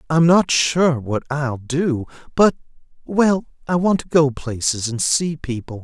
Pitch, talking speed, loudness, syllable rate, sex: 145 Hz, 155 wpm, -19 LUFS, 3.9 syllables/s, male